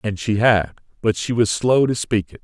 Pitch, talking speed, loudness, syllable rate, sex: 105 Hz, 245 wpm, -19 LUFS, 4.7 syllables/s, male